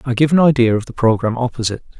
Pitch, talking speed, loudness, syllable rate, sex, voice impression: 125 Hz, 240 wpm, -16 LUFS, 7.9 syllables/s, male, masculine, slightly muffled, slightly raspy, sweet